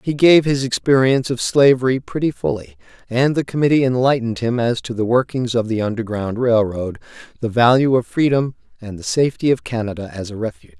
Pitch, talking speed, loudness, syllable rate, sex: 120 Hz, 190 wpm, -18 LUFS, 5.9 syllables/s, male